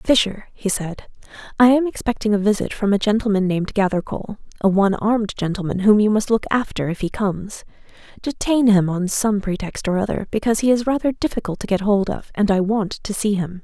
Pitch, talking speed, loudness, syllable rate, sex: 205 Hz, 200 wpm, -20 LUFS, 5.9 syllables/s, female